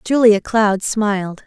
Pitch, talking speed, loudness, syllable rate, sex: 210 Hz, 125 wpm, -16 LUFS, 3.7 syllables/s, female